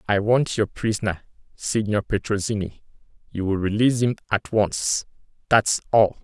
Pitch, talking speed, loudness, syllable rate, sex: 105 Hz, 125 wpm, -22 LUFS, 4.8 syllables/s, male